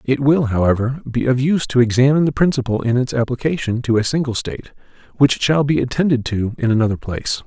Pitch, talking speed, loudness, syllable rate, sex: 130 Hz, 200 wpm, -17 LUFS, 6.3 syllables/s, male